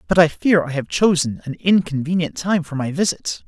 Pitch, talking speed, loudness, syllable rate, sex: 165 Hz, 205 wpm, -19 LUFS, 5.3 syllables/s, male